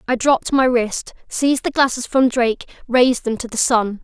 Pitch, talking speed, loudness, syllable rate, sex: 245 Hz, 210 wpm, -18 LUFS, 5.4 syllables/s, female